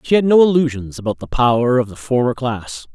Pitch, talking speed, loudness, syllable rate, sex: 130 Hz, 225 wpm, -17 LUFS, 5.7 syllables/s, male